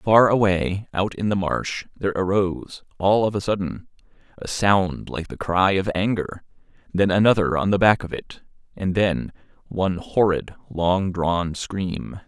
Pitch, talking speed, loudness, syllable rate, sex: 95 Hz, 160 wpm, -22 LUFS, 4.3 syllables/s, male